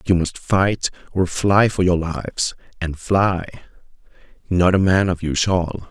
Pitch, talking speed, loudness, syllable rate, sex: 90 Hz, 165 wpm, -19 LUFS, 3.9 syllables/s, male